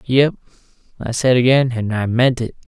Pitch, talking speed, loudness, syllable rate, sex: 125 Hz, 175 wpm, -17 LUFS, 4.9 syllables/s, male